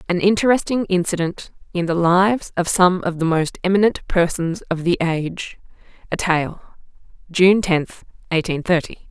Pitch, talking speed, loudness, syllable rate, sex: 180 Hz, 145 wpm, -19 LUFS, 4.7 syllables/s, female